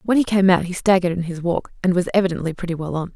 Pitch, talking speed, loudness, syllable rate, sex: 180 Hz, 285 wpm, -20 LUFS, 7.2 syllables/s, female